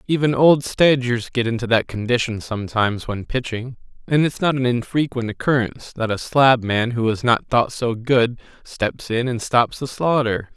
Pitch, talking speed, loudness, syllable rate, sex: 120 Hz, 175 wpm, -20 LUFS, 4.8 syllables/s, male